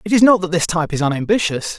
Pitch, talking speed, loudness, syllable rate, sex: 180 Hz, 270 wpm, -16 LUFS, 7.1 syllables/s, male